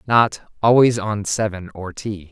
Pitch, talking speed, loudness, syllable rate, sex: 105 Hz, 155 wpm, -19 LUFS, 3.9 syllables/s, male